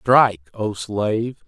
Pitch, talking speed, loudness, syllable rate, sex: 110 Hz, 120 wpm, -21 LUFS, 3.9 syllables/s, male